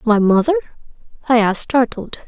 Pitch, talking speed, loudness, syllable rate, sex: 235 Hz, 130 wpm, -16 LUFS, 6.0 syllables/s, female